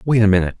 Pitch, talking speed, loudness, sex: 105 Hz, 300 wpm, -15 LUFS, male